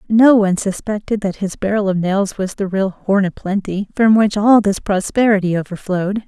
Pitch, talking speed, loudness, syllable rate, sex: 200 Hz, 190 wpm, -16 LUFS, 5.2 syllables/s, female